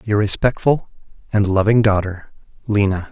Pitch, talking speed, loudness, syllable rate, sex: 105 Hz, 115 wpm, -18 LUFS, 4.9 syllables/s, male